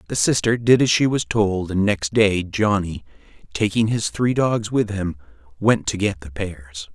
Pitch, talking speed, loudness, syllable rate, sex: 100 Hz, 190 wpm, -20 LUFS, 4.3 syllables/s, male